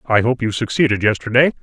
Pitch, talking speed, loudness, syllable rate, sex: 120 Hz, 185 wpm, -17 LUFS, 6.3 syllables/s, male